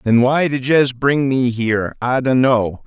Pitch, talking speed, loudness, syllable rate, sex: 130 Hz, 190 wpm, -16 LUFS, 4.1 syllables/s, male